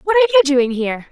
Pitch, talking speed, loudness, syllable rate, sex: 315 Hz, 270 wpm, -15 LUFS, 7.0 syllables/s, female